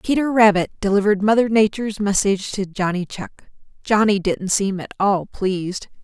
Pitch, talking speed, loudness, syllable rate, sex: 200 Hz, 150 wpm, -19 LUFS, 5.3 syllables/s, female